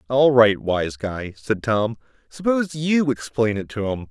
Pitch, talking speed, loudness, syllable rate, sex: 115 Hz, 175 wpm, -21 LUFS, 4.3 syllables/s, male